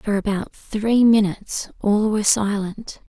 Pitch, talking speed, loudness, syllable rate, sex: 210 Hz, 135 wpm, -20 LUFS, 4.2 syllables/s, female